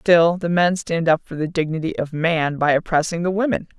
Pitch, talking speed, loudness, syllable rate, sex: 165 Hz, 220 wpm, -20 LUFS, 5.3 syllables/s, female